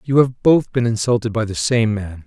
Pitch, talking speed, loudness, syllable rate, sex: 115 Hz, 240 wpm, -18 LUFS, 5.1 syllables/s, male